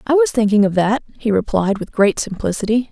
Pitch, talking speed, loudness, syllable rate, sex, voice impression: 220 Hz, 205 wpm, -17 LUFS, 5.7 syllables/s, female, very feminine, young, slightly adult-like, thin, slightly relaxed, slightly weak, slightly bright, soft, very clear, very fluent, slightly raspy, very cute, slightly cool, intellectual, very refreshing, sincere, slightly calm, friendly, very reassuring, unique, elegant, slightly wild, sweet, lively, kind, slightly intense, slightly sharp, slightly modest, light